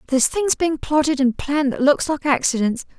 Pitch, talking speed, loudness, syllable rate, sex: 280 Hz, 200 wpm, -19 LUFS, 5.6 syllables/s, female